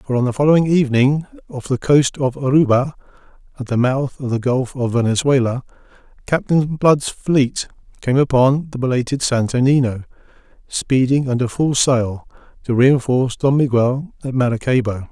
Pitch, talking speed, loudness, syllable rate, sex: 130 Hz, 145 wpm, -17 LUFS, 5.0 syllables/s, male